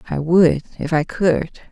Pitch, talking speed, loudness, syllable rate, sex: 165 Hz, 175 wpm, -18 LUFS, 3.9 syllables/s, female